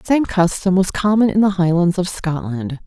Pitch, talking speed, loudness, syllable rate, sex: 185 Hz, 210 wpm, -17 LUFS, 5.0 syllables/s, female